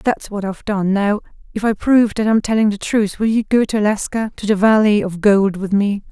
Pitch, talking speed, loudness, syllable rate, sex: 210 Hz, 235 wpm, -17 LUFS, 5.6 syllables/s, female